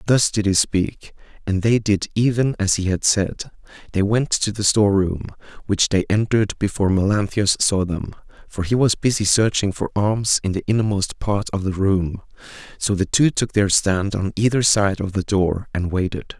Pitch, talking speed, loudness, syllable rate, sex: 100 Hz, 195 wpm, -19 LUFS, 4.8 syllables/s, male